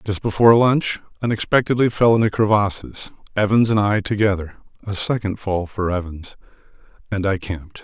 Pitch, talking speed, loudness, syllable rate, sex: 105 Hz, 140 wpm, -19 LUFS, 5.4 syllables/s, male